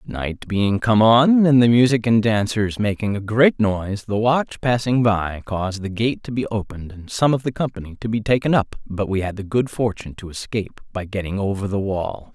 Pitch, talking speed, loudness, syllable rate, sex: 110 Hz, 220 wpm, -20 LUFS, 5.2 syllables/s, male